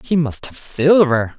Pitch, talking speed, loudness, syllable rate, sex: 140 Hz, 175 wpm, -16 LUFS, 3.9 syllables/s, male